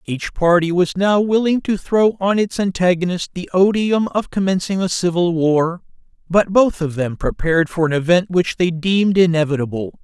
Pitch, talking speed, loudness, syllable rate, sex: 180 Hz, 175 wpm, -17 LUFS, 4.9 syllables/s, male